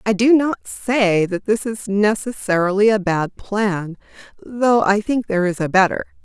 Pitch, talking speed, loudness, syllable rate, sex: 205 Hz, 175 wpm, -18 LUFS, 4.6 syllables/s, female